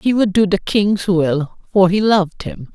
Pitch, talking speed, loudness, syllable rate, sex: 190 Hz, 220 wpm, -16 LUFS, 4.2 syllables/s, female